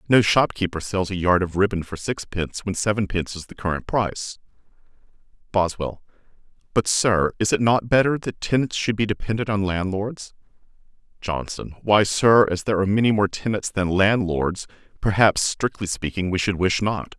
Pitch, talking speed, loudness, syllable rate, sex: 100 Hz, 170 wpm, -22 LUFS, 5.2 syllables/s, male